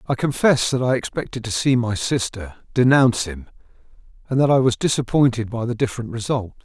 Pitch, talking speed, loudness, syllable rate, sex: 120 Hz, 180 wpm, -20 LUFS, 5.9 syllables/s, male